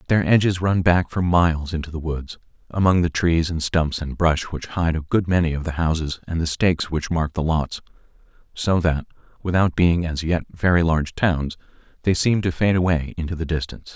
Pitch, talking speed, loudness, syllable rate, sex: 85 Hz, 205 wpm, -21 LUFS, 5.3 syllables/s, male